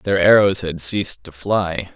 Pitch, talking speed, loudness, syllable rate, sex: 95 Hz, 185 wpm, -18 LUFS, 4.2 syllables/s, male